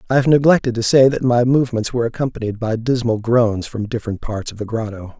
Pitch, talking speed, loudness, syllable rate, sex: 115 Hz, 220 wpm, -18 LUFS, 6.2 syllables/s, male